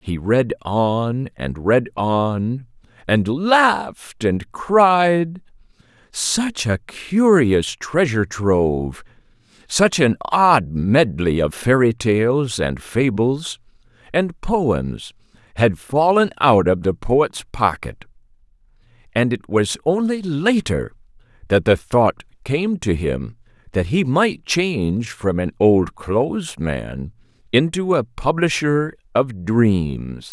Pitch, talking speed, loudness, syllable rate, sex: 125 Hz, 110 wpm, -19 LUFS, 3.1 syllables/s, male